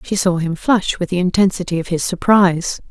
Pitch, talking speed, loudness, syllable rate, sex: 180 Hz, 205 wpm, -17 LUFS, 5.5 syllables/s, female